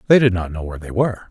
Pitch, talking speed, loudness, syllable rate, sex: 100 Hz, 320 wpm, -19 LUFS, 8.7 syllables/s, male